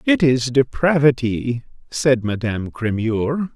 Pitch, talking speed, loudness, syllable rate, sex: 125 Hz, 100 wpm, -19 LUFS, 3.8 syllables/s, male